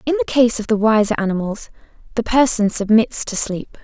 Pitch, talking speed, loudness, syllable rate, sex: 225 Hz, 190 wpm, -17 LUFS, 5.4 syllables/s, female